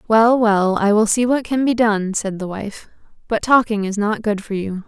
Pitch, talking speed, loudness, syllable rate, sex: 215 Hz, 235 wpm, -18 LUFS, 4.7 syllables/s, female